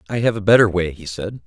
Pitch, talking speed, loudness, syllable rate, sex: 95 Hz, 285 wpm, -18 LUFS, 6.5 syllables/s, male